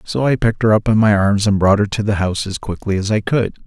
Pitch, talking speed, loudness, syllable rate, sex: 105 Hz, 310 wpm, -16 LUFS, 6.3 syllables/s, male